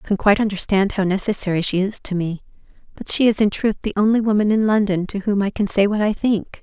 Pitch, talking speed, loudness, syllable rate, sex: 205 Hz, 255 wpm, -19 LUFS, 6.2 syllables/s, female